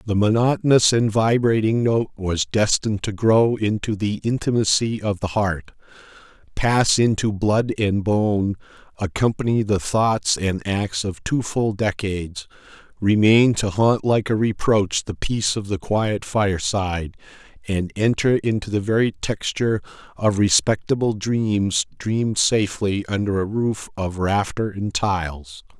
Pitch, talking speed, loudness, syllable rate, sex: 105 Hz, 135 wpm, -21 LUFS, 4.3 syllables/s, male